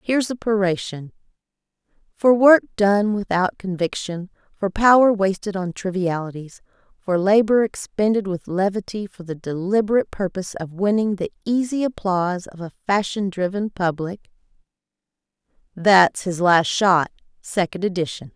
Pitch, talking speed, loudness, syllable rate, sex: 195 Hz, 125 wpm, -20 LUFS, 5.0 syllables/s, female